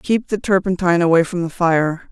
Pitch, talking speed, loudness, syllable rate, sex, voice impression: 180 Hz, 200 wpm, -17 LUFS, 5.5 syllables/s, female, feminine, very adult-like, intellectual, slightly calm, slightly sharp